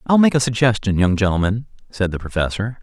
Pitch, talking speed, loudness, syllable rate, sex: 110 Hz, 190 wpm, -19 LUFS, 6.1 syllables/s, male